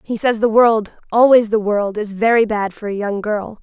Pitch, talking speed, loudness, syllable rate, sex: 215 Hz, 230 wpm, -16 LUFS, 4.7 syllables/s, female